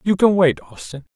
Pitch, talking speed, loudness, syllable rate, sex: 145 Hz, 210 wpm, -16 LUFS, 5.1 syllables/s, male